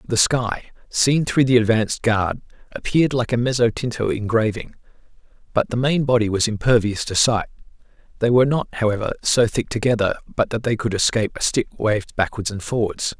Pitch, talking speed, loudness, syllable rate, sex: 115 Hz, 175 wpm, -20 LUFS, 5.6 syllables/s, male